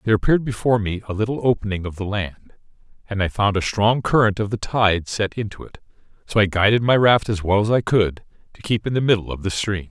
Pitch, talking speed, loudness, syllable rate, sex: 105 Hz, 240 wpm, -20 LUFS, 6.1 syllables/s, male